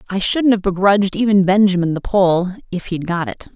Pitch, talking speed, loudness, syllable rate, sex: 190 Hz, 205 wpm, -16 LUFS, 5.5 syllables/s, female